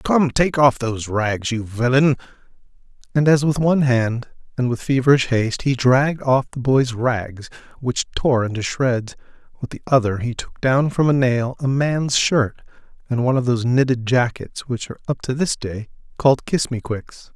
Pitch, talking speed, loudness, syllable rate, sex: 130 Hz, 185 wpm, -19 LUFS, 4.9 syllables/s, male